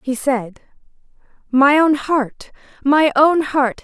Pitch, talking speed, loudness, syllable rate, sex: 275 Hz, 125 wpm, -16 LUFS, 3.3 syllables/s, female